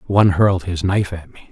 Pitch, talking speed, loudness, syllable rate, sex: 95 Hz, 240 wpm, -17 LUFS, 6.7 syllables/s, male